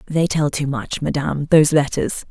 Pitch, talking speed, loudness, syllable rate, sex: 145 Hz, 180 wpm, -18 LUFS, 5.2 syllables/s, female